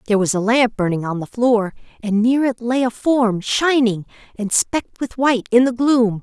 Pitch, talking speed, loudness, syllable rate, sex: 230 Hz, 210 wpm, -18 LUFS, 5.0 syllables/s, female